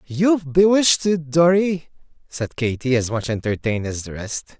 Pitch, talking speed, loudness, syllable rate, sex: 145 Hz, 155 wpm, -20 LUFS, 5.0 syllables/s, male